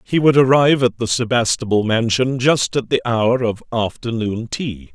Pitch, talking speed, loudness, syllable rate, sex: 120 Hz, 170 wpm, -17 LUFS, 4.7 syllables/s, male